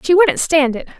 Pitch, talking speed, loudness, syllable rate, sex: 315 Hz, 240 wpm, -15 LUFS, 4.9 syllables/s, female